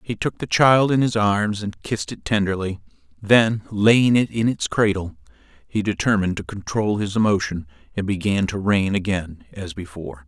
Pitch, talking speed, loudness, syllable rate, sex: 100 Hz, 175 wpm, -20 LUFS, 4.9 syllables/s, male